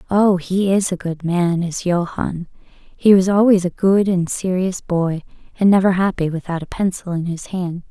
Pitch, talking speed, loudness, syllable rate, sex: 180 Hz, 190 wpm, -18 LUFS, 4.5 syllables/s, female